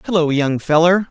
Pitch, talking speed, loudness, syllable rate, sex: 165 Hz, 160 wpm, -16 LUFS, 5.3 syllables/s, male